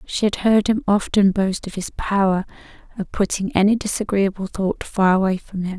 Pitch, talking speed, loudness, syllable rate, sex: 195 Hz, 185 wpm, -20 LUFS, 5.0 syllables/s, female